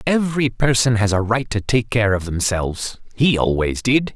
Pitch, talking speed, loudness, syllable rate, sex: 115 Hz, 190 wpm, -19 LUFS, 4.9 syllables/s, male